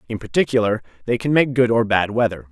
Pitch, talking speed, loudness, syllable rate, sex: 115 Hz, 215 wpm, -19 LUFS, 6.3 syllables/s, male